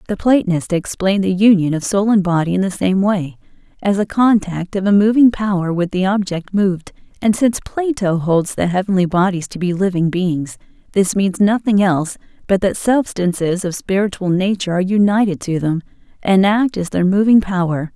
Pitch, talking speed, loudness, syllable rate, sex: 190 Hz, 185 wpm, -16 LUFS, 5.3 syllables/s, female